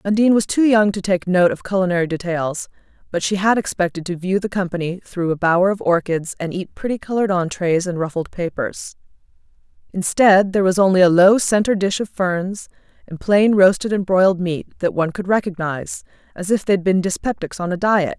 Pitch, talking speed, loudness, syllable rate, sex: 185 Hz, 190 wpm, -18 LUFS, 5.6 syllables/s, female